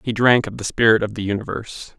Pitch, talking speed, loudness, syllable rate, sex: 110 Hz, 240 wpm, -19 LUFS, 6.4 syllables/s, male